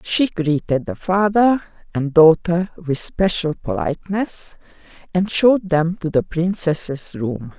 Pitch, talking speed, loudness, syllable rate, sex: 170 Hz, 125 wpm, -19 LUFS, 3.9 syllables/s, female